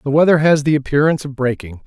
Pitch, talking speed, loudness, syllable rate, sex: 145 Hz, 225 wpm, -15 LUFS, 6.9 syllables/s, male